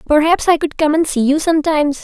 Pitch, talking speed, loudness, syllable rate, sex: 305 Hz, 235 wpm, -14 LUFS, 6.5 syllables/s, female